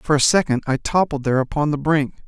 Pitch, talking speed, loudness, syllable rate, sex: 145 Hz, 240 wpm, -19 LUFS, 6.2 syllables/s, male